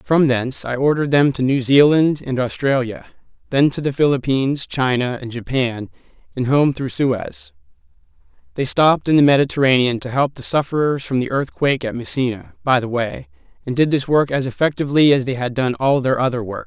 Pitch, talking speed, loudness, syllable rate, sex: 135 Hz, 185 wpm, -18 LUFS, 5.6 syllables/s, male